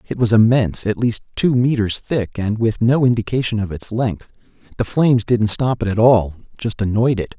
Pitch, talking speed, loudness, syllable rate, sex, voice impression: 110 Hz, 205 wpm, -18 LUFS, 5.2 syllables/s, male, masculine, adult-like, slightly refreshing, sincere, slightly calm